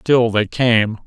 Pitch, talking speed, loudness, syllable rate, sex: 115 Hz, 170 wpm, -16 LUFS, 3.1 syllables/s, male